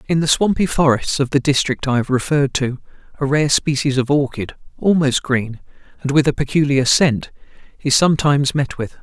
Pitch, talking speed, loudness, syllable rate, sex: 140 Hz, 180 wpm, -17 LUFS, 5.4 syllables/s, male